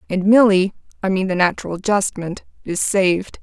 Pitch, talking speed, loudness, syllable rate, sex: 190 Hz, 125 wpm, -18 LUFS, 5.4 syllables/s, female